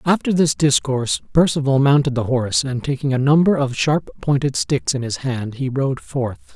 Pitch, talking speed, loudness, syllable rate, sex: 135 Hz, 190 wpm, -19 LUFS, 5.0 syllables/s, male